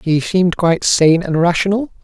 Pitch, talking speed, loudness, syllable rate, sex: 175 Hz, 175 wpm, -14 LUFS, 5.2 syllables/s, male